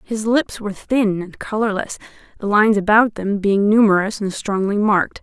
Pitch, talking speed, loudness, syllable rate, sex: 210 Hz, 170 wpm, -18 LUFS, 5.1 syllables/s, female